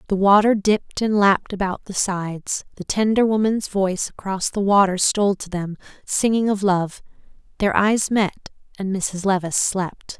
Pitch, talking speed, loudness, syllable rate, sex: 195 Hz, 160 wpm, -20 LUFS, 4.8 syllables/s, female